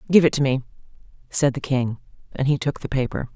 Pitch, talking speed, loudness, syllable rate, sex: 135 Hz, 215 wpm, -22 LUFS, 6.2 syllables/s, female